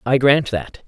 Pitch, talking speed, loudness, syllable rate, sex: 125 Hz, 205 wpm, -17 LUFS, 4.0 syllables/s, male